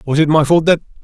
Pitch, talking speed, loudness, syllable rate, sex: 155 Hz, 290 wpm, -13 LUFS, 6.9 syllables/s, male